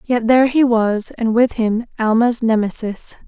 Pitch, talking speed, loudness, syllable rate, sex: 230 Hz, 145 wpm, -16 LUFS, 4.4 syllables/s, female